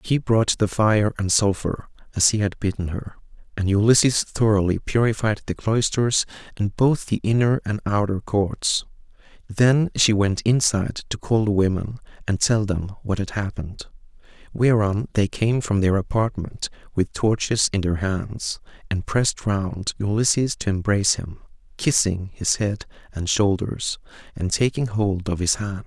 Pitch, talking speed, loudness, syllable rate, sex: 105 Hz, 155 wpm, -22 LUFS, 4.5 syllables/s, male